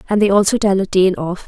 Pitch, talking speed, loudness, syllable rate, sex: 195 Hz, 285 wpm, -15 LUFS, 6.5 syllables/s, female